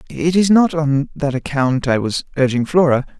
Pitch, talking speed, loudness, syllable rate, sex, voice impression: 145 Hz, 190 wpm, -16 LUFS, 4.7 syllables/s, male, masculine, adult-like, slightly relaxed, slightly hard, muffled, raspy, cool, sincere, calm, friendly, wild, lively, kind